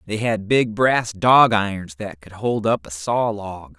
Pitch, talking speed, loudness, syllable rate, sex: 105 Hz, 205 wpm, -19 LUFS, 3.9 syllables/s, male